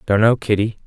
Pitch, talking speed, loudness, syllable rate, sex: 105 Hz, 210 wpm, -17 LUFS, 6.0 syllables/s, male